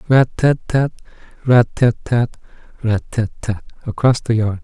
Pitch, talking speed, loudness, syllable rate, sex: 120 Hz, 115 wpm, -18 LUFS, 4.0 syllables/s, male